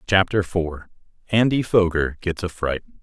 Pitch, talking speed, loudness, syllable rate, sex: 95 Hz, 120 wpm, -21 LUFS, 4.4 syllables/s, male